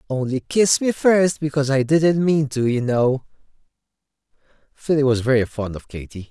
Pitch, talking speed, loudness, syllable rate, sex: 140 Hz, 150 wpm, -19 LUFS, 5.0 syllables/s, male